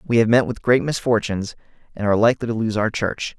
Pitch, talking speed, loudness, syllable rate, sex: 115 Hz, 230 wpm, -20 LUFS, 6.6 syllables/s, male